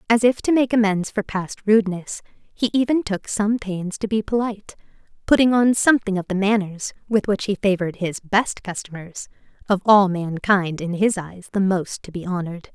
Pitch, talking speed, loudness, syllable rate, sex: 200 Hz, 190 wpm, -21 LUFS, 5.1 syllables/s, female